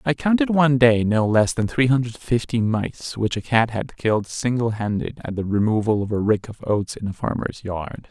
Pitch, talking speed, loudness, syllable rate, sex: 115 Hz, 220 wpm, -21 LUFS, 5.1 syllables/s, male